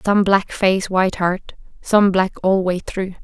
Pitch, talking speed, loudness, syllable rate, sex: 190 Hz, 185 wpm, -18 LUFS, 3.9 syllables/s, female